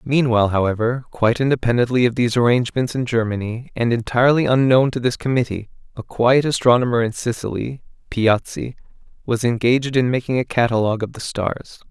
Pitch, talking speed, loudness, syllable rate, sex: 120 Hz, 150 wpm, -19 LUFS, 5.9 syllables/s, male